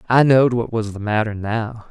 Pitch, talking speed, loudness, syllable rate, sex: 115 Hz, 220 wpm, -18 LUFS, 5.3 syllables/s, male